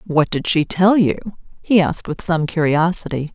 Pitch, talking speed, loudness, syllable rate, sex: 170 Hz, 180 wpm, -17 LUFS, 5.1 syllables/s, female